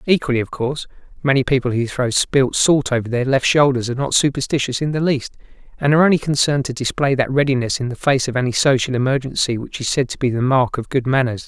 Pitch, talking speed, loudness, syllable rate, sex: 130 Hz, 230 wpm, -18 LUFS, 6.5 syllables/s, male